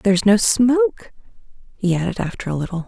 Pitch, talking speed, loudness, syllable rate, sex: 190 Hz, 165 wpm, -18 LUFS, 5.9 syllables/s, female